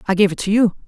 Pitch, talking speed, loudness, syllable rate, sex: 200 Hz, 345 wpm, -17 LUFS, 7.9 syllables/s, female